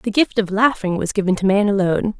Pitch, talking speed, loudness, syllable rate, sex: 200 Hz, 245 wpm, -18 LUFS, 6.1 syllables/s, female